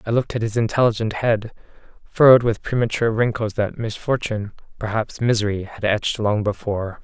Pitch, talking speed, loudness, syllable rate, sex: 110 Hz, 155 wpm, -20 LUFS, 6.0 syllables/s, male